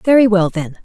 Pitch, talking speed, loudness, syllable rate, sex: 200 Hz, 215 wpm, -14 LUFS, 6.0 syllables/s, female